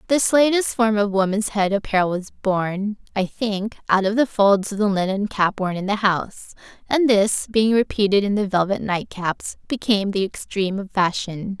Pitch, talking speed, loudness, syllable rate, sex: 205 Hz, 190 wpm, -20 LUFS, 4.9 syllables/s, female